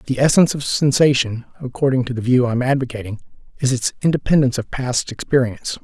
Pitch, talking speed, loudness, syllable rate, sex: 130 Hz, 175 wpm, -18 LUFS, 6.6 syllables/s, male